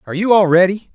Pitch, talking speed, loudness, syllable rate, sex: 190 Hz, 255 wpm, -13 LUFS, 7.5 syllables/s, male